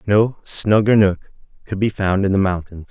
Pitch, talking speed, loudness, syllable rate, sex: 100 Hz, 185 wpm, -17 LUFS, 4.6 syllables/s, male